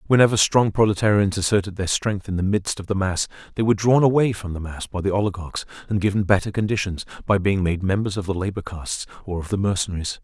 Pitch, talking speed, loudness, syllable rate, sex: 100 Hz, 225 wpm, -22 LUFS, 6.4 syllables/s, male